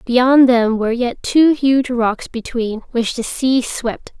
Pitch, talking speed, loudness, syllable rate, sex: 245 Hz, 170 wpm, -16 LUFS, 3.6 syllables/s, female